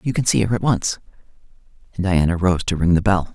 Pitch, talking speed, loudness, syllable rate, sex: 95 Hz, 235 wpm, -19 LUFS, 6.1 syllables/s, male